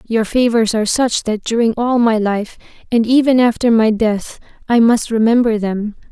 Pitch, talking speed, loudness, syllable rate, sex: 225 Hz, 175 wpm, -15 LUFS, 4.8 syllables/s, female